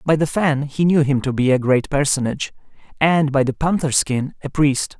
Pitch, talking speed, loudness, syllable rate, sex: 145 Hz, 215 wpm, -18 LUFS, 5.1 syllables/s, male